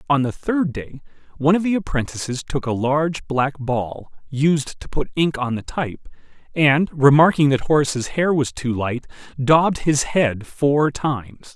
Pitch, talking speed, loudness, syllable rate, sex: 140 Hz, 170 wpm, -20 LUFS, 4.5 syllables/s, male